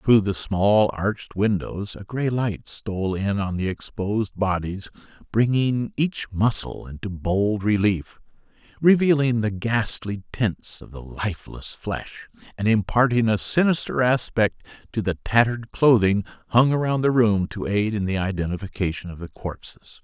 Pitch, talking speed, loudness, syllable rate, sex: 105 Hz, 145 wpm, -23 LUFS, 4.5 syllables/s, male